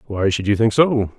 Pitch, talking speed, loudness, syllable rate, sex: 110 Hz, 255 wpm, -17 LUFS, 5.0 syllables/s, male